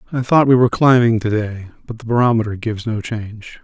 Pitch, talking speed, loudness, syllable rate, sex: 115 Hz, 215 wpm, -16 LUFS, 6.2 syllables/s, male